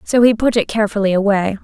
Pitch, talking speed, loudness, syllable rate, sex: 210 Hz, 220 wpm, -15 LUFS, 6.7 syllables/s, female